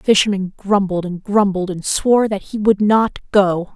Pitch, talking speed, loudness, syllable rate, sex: 200 Hz, 190 wpm, -17 LUFS, 4.8 syllables/s, female